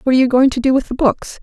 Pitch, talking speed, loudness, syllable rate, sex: 260 Hz, 380 wpm, -15 LUFS, 7.6 syllables/s, female